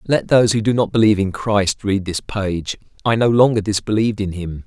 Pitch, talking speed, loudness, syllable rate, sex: 105 Hz, 220 wpm, -18 LUFS, 5.7 syllables/s, male